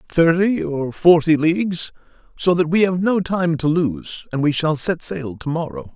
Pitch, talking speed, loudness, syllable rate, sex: 165 Hz, 190 wpm, -19 LUFS, 4.4 syllables/s, male